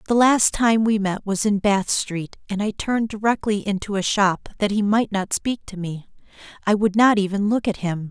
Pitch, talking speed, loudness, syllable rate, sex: 205 Hz, 220 wpm, -21 LUFS, 5.0 syllables/s, female